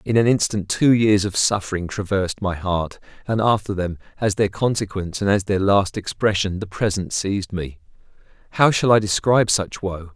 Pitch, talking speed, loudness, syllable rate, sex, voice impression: 100 Hz, 185 wpm, -20 LUFS, 5.2 syllables/s, male, very masculine, very adult-like, middle-aged, very thick, tensed, powerful, bright, hard, clear, fluent, slightly raspy, slightly cool, intellectual, slightly refreshing, sincere, very calm, slightly mature, slightly friendly, slightly reassuring, very unique, slightly elegant, wild, kind, modest